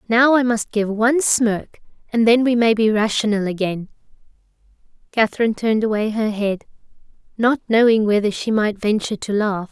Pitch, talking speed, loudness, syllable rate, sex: 220 Hz, 160 wpm, -18 LUFS, 5.3 syllables/s, female